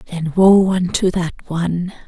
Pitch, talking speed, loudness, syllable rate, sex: 175 Hz, 145 wpm, -16 LUFS, 4.6 syllables/s, female